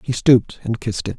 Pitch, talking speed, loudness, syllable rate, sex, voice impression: 115 Hz, 255 wpm, -18 LUFS, 6.6 syllables/s, male, masculine, adult-like, slightly relaxed, powerful, slightly soft, slightly muffled, raspy, cool, intellectual, calm, friendly, reassuring, wild, lively